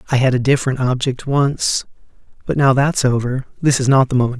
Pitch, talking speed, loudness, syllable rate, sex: 130 Hz, 205 wpm, -17 LUFS, 5.8 syllables/s, male